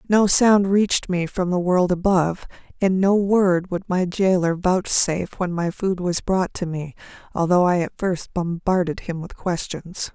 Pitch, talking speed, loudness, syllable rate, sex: 180 Hz, 175 wpm, -21 LUFS, 4.4 syllables/s, female